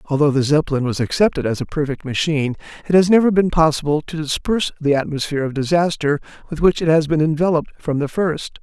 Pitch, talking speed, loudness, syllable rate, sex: 155 Hz, 200 wpm, -18 LUFS, 6.5 syllables/s, male